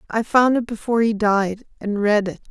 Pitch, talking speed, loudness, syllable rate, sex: 215 Hz, 190 wpm, -20 LUFS, 5.2 syllables/s, female